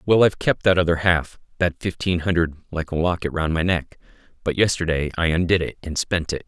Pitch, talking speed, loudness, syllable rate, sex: 85 Hz, 215 wpm, -21 LUFS, 5.7 syllables/s, male